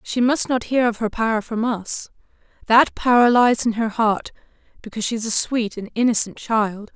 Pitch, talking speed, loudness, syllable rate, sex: 225 Hz, 200 wpm, -19 LUFS, 5.1 syllables/s, female